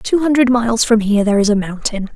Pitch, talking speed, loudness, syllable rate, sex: 225 Hz, 250 wpm, -15 LUFS, 6.7 syllables/s, female